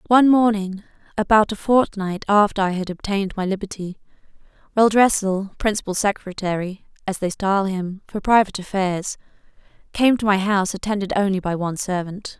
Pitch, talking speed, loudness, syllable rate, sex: 200 Hz, 145 wpm, -20 LUFS, 5.4 syllables/s, female